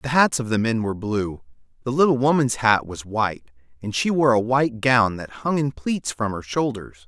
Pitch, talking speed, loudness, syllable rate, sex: 120 Hz, 220 wpm, -21 LUFS, 5.1 syllables/s, male